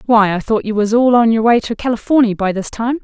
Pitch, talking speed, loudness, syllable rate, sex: 225 Hz, 275 wpm, -14 LUFS, 5.9 syllables/s, female